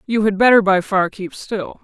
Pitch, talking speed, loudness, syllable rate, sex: 205 Hz, 230 wpm, -16 LUFS, 4.7 syllables/s, female